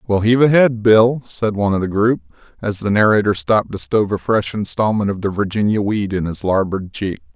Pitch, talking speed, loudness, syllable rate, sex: 105 Hz, 210 wpm, -17 LUFS, 5.7 syllables/s, male